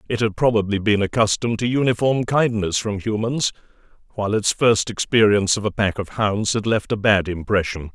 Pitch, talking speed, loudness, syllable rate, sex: 105 Hz, 180 wpm, -20 LUFS, 5.5 syllables/s, male